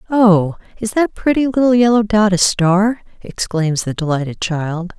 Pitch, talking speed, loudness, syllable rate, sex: 200 Hz, 155 wpm, -15 LUFS, 4.4 syllables/s, female